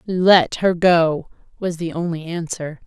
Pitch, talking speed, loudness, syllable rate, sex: 170 Hz, 145 wpm, -19 LUFS, 3.7 syllables/s, female